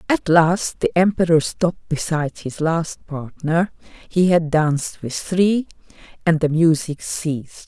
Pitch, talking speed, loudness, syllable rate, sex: 165 Hz, 140 wpm, -19 LUFS, 3.7 syllables/s, female